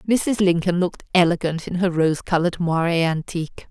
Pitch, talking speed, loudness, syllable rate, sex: 175 Hz, 160 wpm, -21 LUFS, 5.6 syllables/s, female